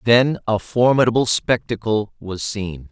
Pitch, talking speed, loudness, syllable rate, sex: 110 Hz, 125 wpm, -19 LUFS, 4.2 syllables/s, male